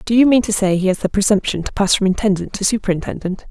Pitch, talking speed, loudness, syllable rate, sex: 200 Hz, 255 wpm, -17 LUFS, 6.7 syllables/s, female